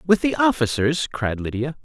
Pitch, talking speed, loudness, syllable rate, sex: 135 Hz, 165 wpm, -21 LUFS, 4.7 syllables/s, male